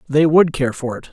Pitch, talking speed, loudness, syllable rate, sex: 145 Hz, 270 wpm, -16 LUFS, 5.3 syllables/s, male